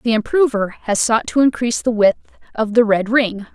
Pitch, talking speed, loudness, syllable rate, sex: 230 Hz, 205 wpm, -17 LUFS, 4.9 syllables/s, female